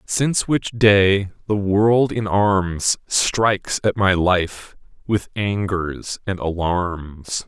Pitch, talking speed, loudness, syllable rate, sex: 100 Hz, 120 wpm, -19 LUFS, 2.8 syllables/s, male